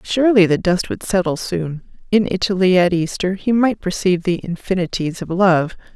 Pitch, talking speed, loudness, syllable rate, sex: 185 Hz, 170 wpm, -18 LUFS, 5.2 syllables/s, female